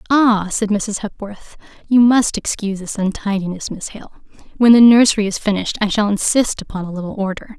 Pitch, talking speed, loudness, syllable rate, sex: 210 Hz, 180 wpm, -16 LUFS, 5.6 syllables/s, female